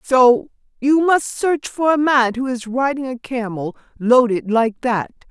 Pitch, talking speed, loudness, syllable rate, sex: 250 Hz, 170 wpm, -18 LUFS, 4.0 syllables/s, female